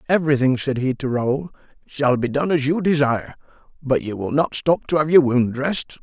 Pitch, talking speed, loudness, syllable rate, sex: 140 Hz, 210 wpm, -20 LUFS, 5.5 syllables/s, male